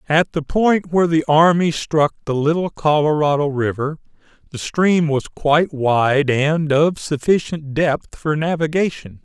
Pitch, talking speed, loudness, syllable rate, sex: 155 Hz, 145 wpm, -18 LUFS, 4.2 syllables/s, male